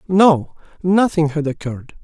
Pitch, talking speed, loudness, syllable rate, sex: 165 Hz, 120 wpm, -17 LUFS, 4.5 syllables/s, male